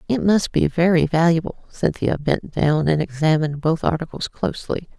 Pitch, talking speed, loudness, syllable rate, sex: 150 Hz, 155 wpm, -20 LUFS, 5.2 syllables/s, female